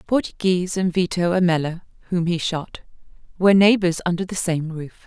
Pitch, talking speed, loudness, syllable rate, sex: 175 Hz, 155 wpm, -20 LUFS, 5.5 syllables/s, female